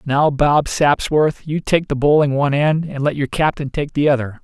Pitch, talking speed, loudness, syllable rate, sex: 145 Hz, 215 wpm, -17 LUFS, 4.9 syllables/s, male